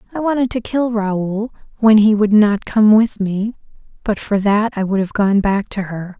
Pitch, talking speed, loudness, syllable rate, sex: 210 Hz, 215 wpm, -16 LUFS, 4.5 syllables/s, female